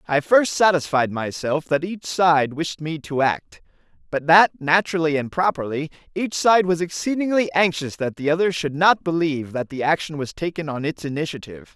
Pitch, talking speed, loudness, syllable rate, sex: 160 Hz, 180 wpm, -21 LUFS, 5.2 syllables/s, male